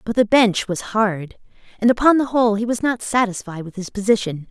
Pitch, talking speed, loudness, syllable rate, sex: 215 Hz, 215 wpm, -19 LUFS, 5.5 syllables/s, female